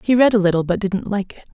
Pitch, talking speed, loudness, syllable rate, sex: 200 Hz, 310 wpm, -18 LUFS, 6.6 syllables/s, female